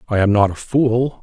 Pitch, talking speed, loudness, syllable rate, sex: 115 Hz, 245 wpm, -17 LUFS, 4.9 syllables/s, male